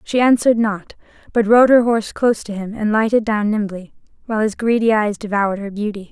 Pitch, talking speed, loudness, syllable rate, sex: 215 Hz, 205 wpm, -17 LUFS, 6.0 syllables/s, female